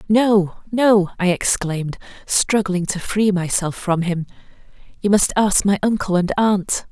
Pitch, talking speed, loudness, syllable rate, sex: 195 Hz, 140 wpm, -18 LUFS, 4.1 syllables/s, female